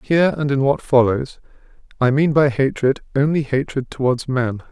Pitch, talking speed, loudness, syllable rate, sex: 135 Hz, 165 wpm, -18 LUFS, 5.0 syllables/s, male